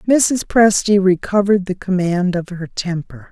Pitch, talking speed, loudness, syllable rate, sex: 190 Hz, 145 wpm, -16 LUFS, 4.5 syllables/s, female